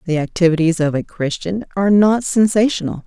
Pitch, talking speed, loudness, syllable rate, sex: 185 Hz, 155 wpm, -16 LUFS, 5.7 syllables/s, female